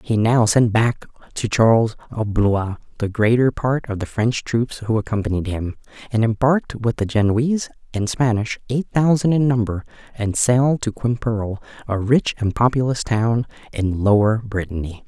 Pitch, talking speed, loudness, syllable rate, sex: 115 Hz, 165 wpm, -20 LUFS, 4.8 syllables/s, male